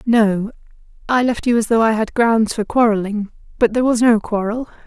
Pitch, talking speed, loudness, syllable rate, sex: 225 Hz, 185 wpm, -17 LUFS, 5.4 syllables/s, female